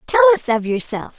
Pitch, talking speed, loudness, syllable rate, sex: 240 Hz, 205 wpm, -17 LUFS, 5.8 syllables/s, female